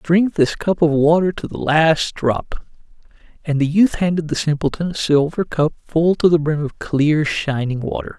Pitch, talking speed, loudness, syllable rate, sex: 155 Hz, 190 wpm, -18 LUFS, 4.5 syllables/s, male